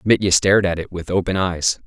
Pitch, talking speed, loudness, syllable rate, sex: 90 Hz, 225 wpm, -18 LUFS, 5.8 syllables/s, male